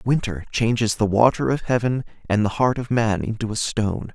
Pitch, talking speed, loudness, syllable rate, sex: 115 Hz, 205 wpm, -21 LUFS, 5.3 syllables/s, male